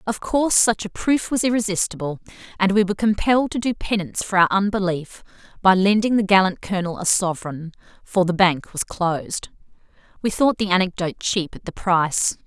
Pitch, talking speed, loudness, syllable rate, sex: 195 Hz, 180 wpm, -20 LUFS, 5.7 syllables/s, female